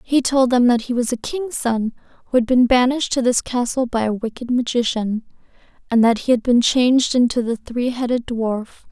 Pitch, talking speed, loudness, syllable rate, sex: 245 Hz, 210 wpm, -19 LUFS, 5.3 syllables/s, female